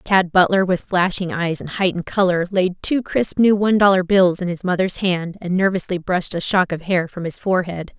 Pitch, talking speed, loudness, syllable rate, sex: 180 Hz, 220 wpm, -19 LUFS, 5.4 syllables/s, female